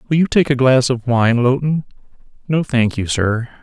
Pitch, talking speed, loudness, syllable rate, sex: 130 Hz, 200 wpm, -16 LUFS, 4.8 syllables/s, male